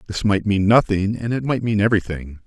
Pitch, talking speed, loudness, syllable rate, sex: 105 Hz, 220 wpm, -19 LUFS, 5.8 syllables/s, male